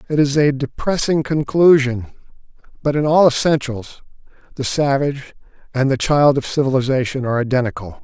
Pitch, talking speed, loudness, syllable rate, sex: 140 Hz, 135 wpm, -17 LUFS, 5.5 syllables/s, male